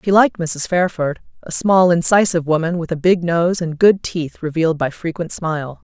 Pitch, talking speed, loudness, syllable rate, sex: 170 Hz, 195 wpm, -17 LUFS, 5.3 syllables/s, female